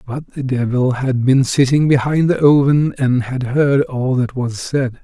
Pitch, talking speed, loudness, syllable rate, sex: 130 Hz, 190 wpm, -16 LUFS, 4.1 syllables/s, male